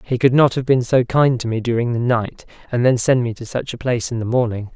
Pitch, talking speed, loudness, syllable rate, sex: 120 Hz, 290 wpm, -18 LUFS, 5.9 syllables/s, male